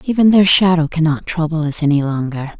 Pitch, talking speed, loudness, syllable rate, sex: 160 Hz, 185 wpm, -15 LUFS, 5.7 syllables/s, female